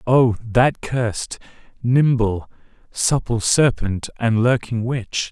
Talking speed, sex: 100 wpm, male